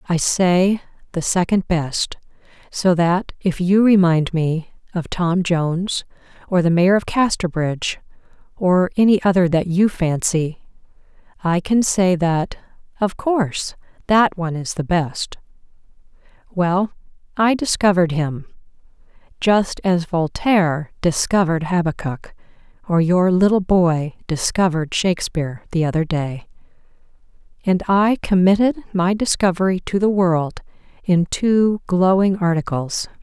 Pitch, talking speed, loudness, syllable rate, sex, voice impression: 180 Hz, 120 wpm, -18 LUFS, 4.3 syllables/s, female, very feminine, very adult-like, slightly middle-aged, very thin, relaxed, weak, dark, very soft, muffled, very fluent, slightly raspy, very cute, very intellectual, very refreshing, sincere, very calm, very friendly, very reassuring, very unique, very elegant, slightly wild, very sweet, slightly lively, very kind, very modest, light